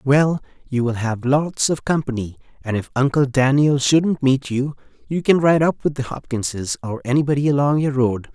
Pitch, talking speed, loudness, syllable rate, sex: 135 Hz, 185 wpm, -19 LUFS, 4.9 syllables/s, male